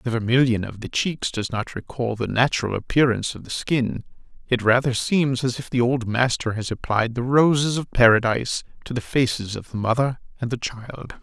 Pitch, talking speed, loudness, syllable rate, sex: 120 Hz, 200 wpm, -22 LUFS, 5.3 syllables/s, male